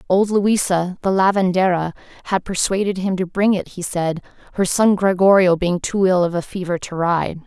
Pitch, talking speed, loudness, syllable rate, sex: 185 Hz, 185 wpm, -18 LUFS, 4.9 syllables/s, female